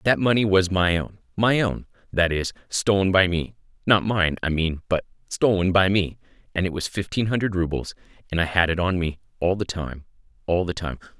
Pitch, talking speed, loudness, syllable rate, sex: 90 Hz, 205 wpm, -23 LUFS, 5.3 syllables/s, male